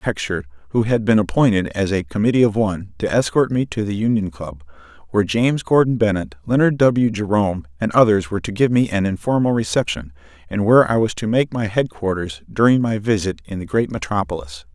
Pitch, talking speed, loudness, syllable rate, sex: 105 Hz, 195 wpm, -19 LUFS, 5.9 syllables/s, male